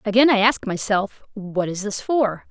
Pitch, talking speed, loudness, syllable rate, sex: 215 Hz, 190 wpm, -20 LUFS, 4.4 syllables/s, female